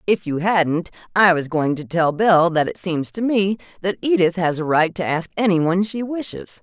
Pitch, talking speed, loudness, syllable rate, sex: 180 Hz, 225 wpm, -19 LUFS, 5.1 syllables/s, female